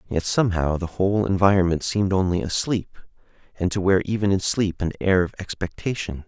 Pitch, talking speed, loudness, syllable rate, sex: 95 Hz, 170 wpm, -22 LUFS, 5.6 syllables/s, male